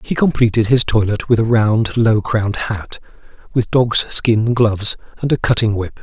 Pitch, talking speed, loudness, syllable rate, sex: 110 Hz, 180 wpm, -16 LUFS, 4.7 syllables/s, male